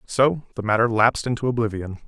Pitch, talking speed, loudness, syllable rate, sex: 115 Hz, 175 wpm, -22 LUFS, 6.3 syllables/s, male